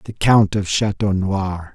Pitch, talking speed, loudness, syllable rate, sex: 100 Hz, 170 wpm, -18 LUFS, 3.7 syllables/s, male